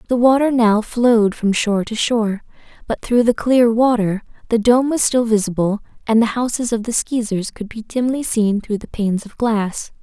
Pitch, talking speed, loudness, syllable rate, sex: 225 Hz, 200 wpm, -17 LUFS, 5.0 syllables/s, female